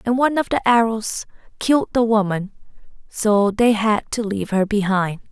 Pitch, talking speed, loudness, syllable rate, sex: 215 Hz, 170 wpm, -19 LUFS, 4.9 syllables/s, female